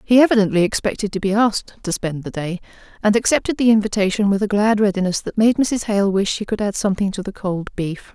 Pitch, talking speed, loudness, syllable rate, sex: 205 Hz, 230 wpm, -19 LUFS, 6.1 syllables/s, female